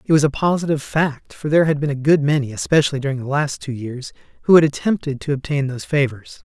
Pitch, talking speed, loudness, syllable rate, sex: 145 Hz, 230 wpm, -19 LUFS, 6.5 syllables/s, male